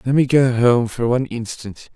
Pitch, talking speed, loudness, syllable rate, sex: 120 Hz, 215 wpm, -17 LUFS, 5.0 syllables/s, male